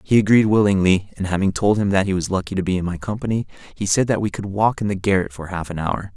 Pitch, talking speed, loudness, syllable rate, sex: 95 Hz, 280 wpm, -20 LUFS, 6.5 syllables/s, male